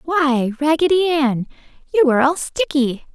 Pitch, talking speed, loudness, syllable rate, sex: 285 Hz, 135 wpm, -17 LUFS, 4.6 syllables/s, female